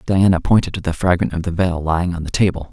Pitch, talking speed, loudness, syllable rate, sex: 90 Hz, 265 wpm, -18 LUFS, 6.6 syllables/s, male